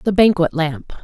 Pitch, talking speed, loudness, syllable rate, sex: 170 Hz, 175 wpm, -17 LUFS, 4.2 syllables/s, female